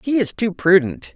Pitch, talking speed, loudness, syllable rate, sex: 195 Hz, 210 wpm, -17 LUFS, 4.8 syllables/s, female